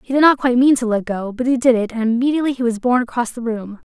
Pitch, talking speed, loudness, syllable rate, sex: 240 Hz, 305 wpm, -17 LUFS, 7.3 syllables/s, female